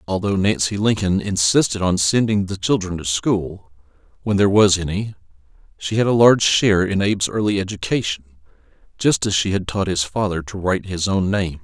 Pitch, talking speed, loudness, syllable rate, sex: 95 Hz, 180 wpm, -19 LUFS, 5.6 syllables/s, male